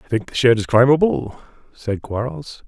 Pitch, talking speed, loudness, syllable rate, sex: 120 Hz, 180 wpm, -18 LUFS, 5.0 syllables/s, male